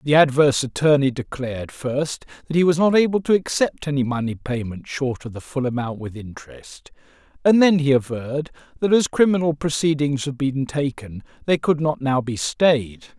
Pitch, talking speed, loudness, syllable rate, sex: 140 Hz, 175 wpm, -20 LUFS, 5.2 syllables/s, male